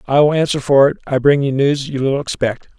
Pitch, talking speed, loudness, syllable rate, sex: 140 Hz, 260 wpm, -15 LUFS, 6.1 syllables/s, male